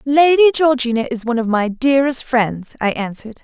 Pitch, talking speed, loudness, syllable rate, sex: 250 Hz, 175 wpm, -16 LUFS, 5.6 syllables/s, female